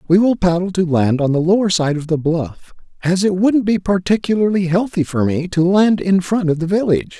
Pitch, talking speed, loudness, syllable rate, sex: 180 Hz, 225 wpm, -16 LUFS, 5.4 syllables/s, male